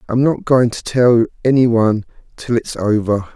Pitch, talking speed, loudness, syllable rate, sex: 115 Hz, 180 wpm, -15 LUFS, 4.9 syllables/s, male